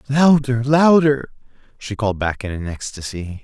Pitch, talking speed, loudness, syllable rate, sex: 120 Hz, 140 wpm, -18 LUFS, 4.7 syllables/s, male